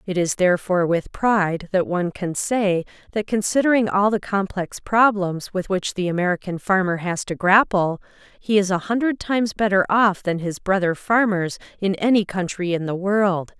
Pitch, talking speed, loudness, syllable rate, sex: 190 Hz, 175 wpm, -21 LUFS, 5.0 syllables/s, female